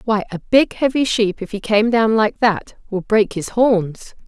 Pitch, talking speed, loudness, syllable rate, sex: 215 Hz, 210 wpm, -17 LUFS, 4.1 syllables/s, female